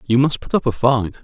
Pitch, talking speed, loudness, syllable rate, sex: 125 Hz, 290 wpm, -18 LUFS, 5.8 syllables/s, male